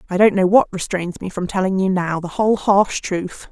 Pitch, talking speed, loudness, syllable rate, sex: 190 Hz, 240 wpm, -18 LUFS, 5.2 syllables/s, female